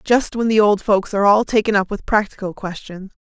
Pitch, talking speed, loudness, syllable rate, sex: 205 Hz, 220 wpm, -17 LUFS, 5.6 syllables/s, female